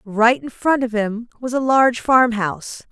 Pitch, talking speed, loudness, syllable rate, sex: 235 Hz, 205 wpm, -18 LUFS, 4.5 syllables/s, female